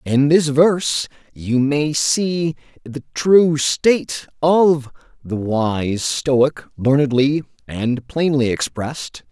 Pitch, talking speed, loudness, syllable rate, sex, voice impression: 140 Hz, 110 wpm, -18 LUFS, 3.1 syllables/s, male, very masculine, very adult-like, middle-aged, very tensed, powerful, bright, very hard, clear, fluent, cool, intellectual, slightly refreshing, very sincere, very calm, friendly, very reassuring, slightly unique, wild, slightly sweet, very lively, kind, slightly intense